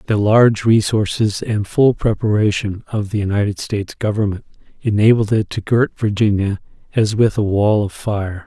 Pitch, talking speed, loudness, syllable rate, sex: 105 Hz, 155 wpm, -17 LUFS, 5.0 syllables/s, male